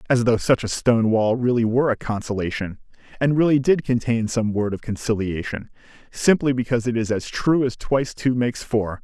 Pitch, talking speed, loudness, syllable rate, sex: 120 Hz, 195 wpm, -21 LUFS, 5.6 syllables/s, male